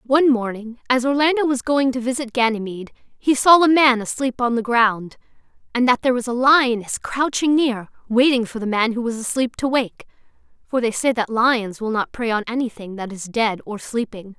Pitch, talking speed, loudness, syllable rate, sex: 240 Hz, 205 wpm, -19 LUFS, 5.1 syllables/s, female